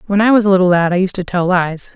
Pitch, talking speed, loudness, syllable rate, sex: 185 Hz, 340 wpm, -14 LUFS, 6.7 syllables/s, female